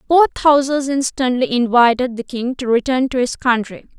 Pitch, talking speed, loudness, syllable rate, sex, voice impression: 255 Hz, 165 wpm, -16 LUFS, 5.1 syllables/s, female, very feminine, slightly adult-like, clear, slightly cute, slightly refreshing, friendly